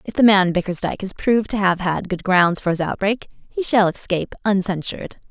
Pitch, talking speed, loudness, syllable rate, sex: 195 Hz, 205 wpm, -19 LUFS, 5.6 syllables/s, female